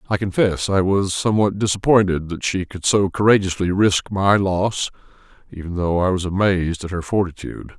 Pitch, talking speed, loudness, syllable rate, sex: 95 Hz, 170 wpm, -19 LUFS, 5.4 syllables/s, male